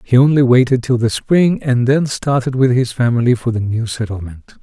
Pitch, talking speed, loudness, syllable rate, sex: 125 Hz, 210 wpm, -15 LUFS, 5.3 syllables/s, male